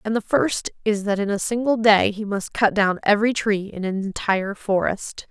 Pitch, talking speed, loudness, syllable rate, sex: 205 Hz, 215 wpm, -21 LUFS, 5.0 syllables/s, female